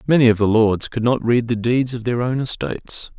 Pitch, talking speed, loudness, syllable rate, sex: 120 Hz, 245 wpm, -19 LUFS, 5.4 syllables/s, male